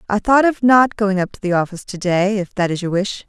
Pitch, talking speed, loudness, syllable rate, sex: 200 Hz, 275 wpm, -17 LUFS, 5.8 syllables/s, female